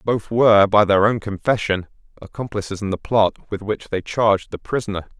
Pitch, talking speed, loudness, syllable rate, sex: 105 Hz, 185 wpm, -19 LUFS, 5.4 syllables/s, male